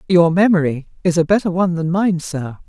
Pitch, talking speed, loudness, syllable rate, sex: 170 Hz, 200 wpm, -17 LUFS, 5.7 syllables/s, female